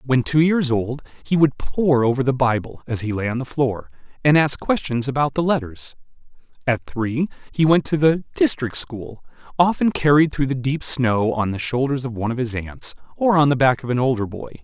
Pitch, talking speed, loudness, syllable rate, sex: 135 Hz, 215 wpm, -20 LUFS, 5.1 syllables/s, male